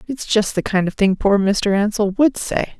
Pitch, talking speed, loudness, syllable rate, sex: 205 Hz, 235 wpm, -18 LUFS, 4.6 syllables/s, female